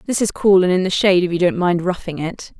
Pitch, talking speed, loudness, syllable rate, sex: 180 Hz, 300 wpm, -17 LUFS, 6.3 syllables/s, female